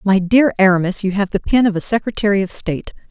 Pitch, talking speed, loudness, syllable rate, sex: 200 Hz, 230 wpm, -16 LUFS, 6.4 syllables/s, female